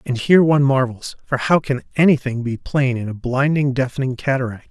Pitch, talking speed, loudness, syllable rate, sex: 135 Hz, 190 wpm, -18 LUFS, 5.7 syllables/s, male